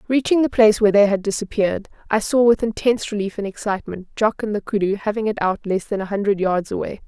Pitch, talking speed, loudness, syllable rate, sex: 210 Hz, 230 wpm, -20 LUFS, 6.5 syllables/s, female